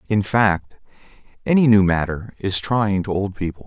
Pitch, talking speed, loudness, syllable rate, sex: 100 Hz, 165 wpm, -19 LUFS, 4.7 syllables/s, male